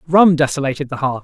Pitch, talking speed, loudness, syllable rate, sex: 145 Hz, 195 wpm, -16 LUFS, 6.4 syllables/s, male